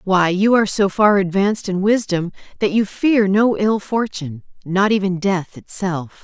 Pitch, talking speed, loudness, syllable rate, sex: 195 Hz, 175 wpm, -18 LUFS, 4.6 syllables/s, female